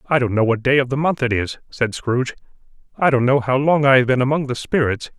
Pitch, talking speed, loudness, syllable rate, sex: 130 Hz, 265 wpm, -18 LUFS, 6.1 syllables/s, male